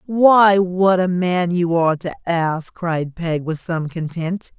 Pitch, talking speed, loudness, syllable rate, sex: 175 Hz, 170 wpm, -18 LUFS, 3.5 syllables/s, female